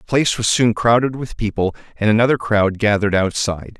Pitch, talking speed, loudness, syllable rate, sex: 110 Hz, 190 wpm, -17 LUFS, 6.2 syllables/s, male